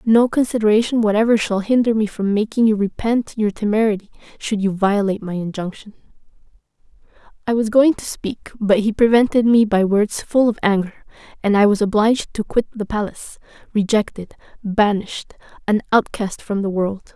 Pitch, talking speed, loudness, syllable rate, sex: 215 Hz, 160 wpm, -18 LUFS, 5.5 syllables/s, female